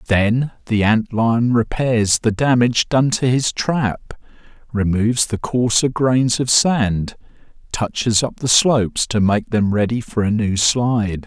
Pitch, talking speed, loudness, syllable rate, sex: 115 Hz, 155 wpm, -17 LUFS, 4.0 syllables/s, male